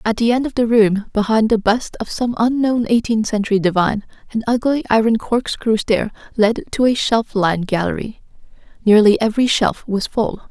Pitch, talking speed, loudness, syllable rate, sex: 220 Hz, 175 wpm, -17 LUFS, 5.3 syllables/s, female